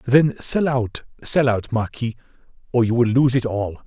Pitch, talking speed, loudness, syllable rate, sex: 120 Hz, 170 wpm, -20 LUFS, 4.5 syllables/s, male